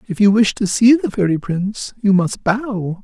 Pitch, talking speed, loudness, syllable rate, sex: 205 Hz, 220 wpm, -16 LUFS, 4.6 syllables/s, male